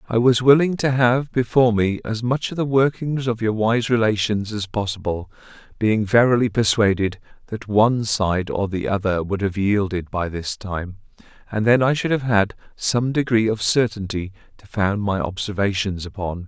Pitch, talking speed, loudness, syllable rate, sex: 110 Hz, 175 wpm, -20 LUFS, 4.8 syllables/s, male